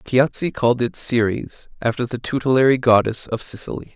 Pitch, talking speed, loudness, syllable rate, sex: 120 Hz, 150 wpm, -20 LUFS, 5.4 syllables/s, male